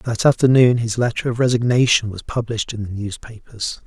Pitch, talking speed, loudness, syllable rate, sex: 115 Hz, 170 wpm, -18 LUFS, 5.5 syllables/s, male